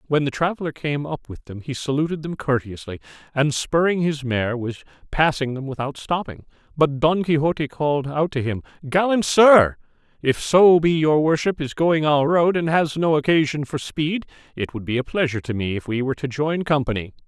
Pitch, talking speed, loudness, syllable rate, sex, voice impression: 145 Hz, 200 wpm, -21 LUFS, 5.3 syllables/s, male, very masculine, very adult-like, middle-aged, thick, tensed, slightly powerful, slightly bright, slightly soft, clear, very fluent, cool, intellectual, slightly refreshing, very sincere, calm, mature, friendly, reassuring, slightly unique, slightly elegant, wild, slightly sweet, very lively, slightly strict, slightly intense